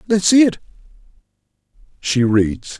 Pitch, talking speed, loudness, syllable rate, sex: 160 Hz, 105 wpm, -16 LUFS, 4.1 syllables/s, male